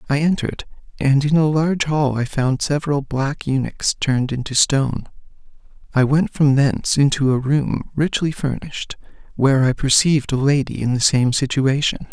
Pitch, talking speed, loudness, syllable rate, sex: 140 Hz, 165 wpm, -18 LUFS, 5.2 syllables/s, male